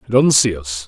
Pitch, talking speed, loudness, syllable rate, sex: 110 Hz, 275 wpm, -15 LUFS, 6.4 syllables/s, male